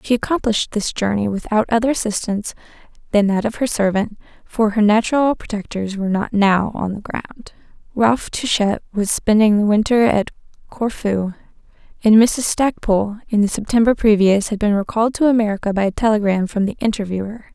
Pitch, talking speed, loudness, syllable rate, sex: 215 Hz, 165 wpm, -18 LUFS, 5.6 syllables/s, female